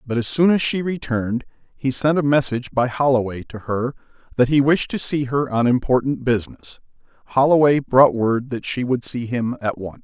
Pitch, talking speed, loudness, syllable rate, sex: 130 Hz, 195 wpm, -20 LUFS, 5.3 syllables/s, male